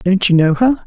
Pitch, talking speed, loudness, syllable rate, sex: 190 Hz, 275 wpm, -13 LUFS, 5.4 syllables/s, male